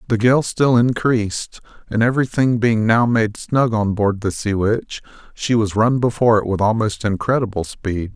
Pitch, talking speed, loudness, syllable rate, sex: 110 Hz, 175 wpm, -18 LUFS, 4.8 syllables/s, male